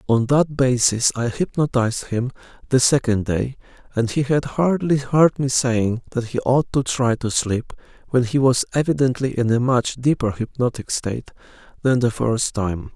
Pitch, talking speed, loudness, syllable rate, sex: 125 Hz, 170 wpm, -20 LUFS, 4.6 syllables/s, male